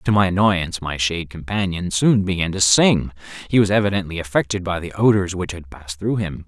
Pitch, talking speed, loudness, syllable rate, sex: 95 Hz, 195 wpm, -19 LUFS, 5.8 syllables/s, male